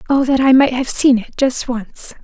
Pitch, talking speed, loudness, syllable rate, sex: 255 Hz, 240 wpm, -15 LUFS, 4.6 syllables/s, female